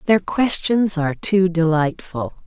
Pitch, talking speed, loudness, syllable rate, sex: 175 Hz, 120 wpm, -19 LUFS, 3.9 syllables/s, female